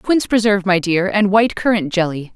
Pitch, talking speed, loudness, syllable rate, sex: 200 Hz, 205 wpm, -16 LUFS, 6.1 syllables/s, female